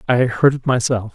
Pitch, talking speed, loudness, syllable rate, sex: 120 Hz, 210 wpm, -17 LUFS, 5.1 syllables/s, male